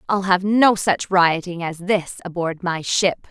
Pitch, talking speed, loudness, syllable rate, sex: 180 Hz, 180 wpm, -19 LUFS, 3.9 syllables/s, female